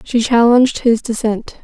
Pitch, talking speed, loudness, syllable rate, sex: 235 Hz, 145 wpm, -14 LUFS, 4.6 syllables/s, female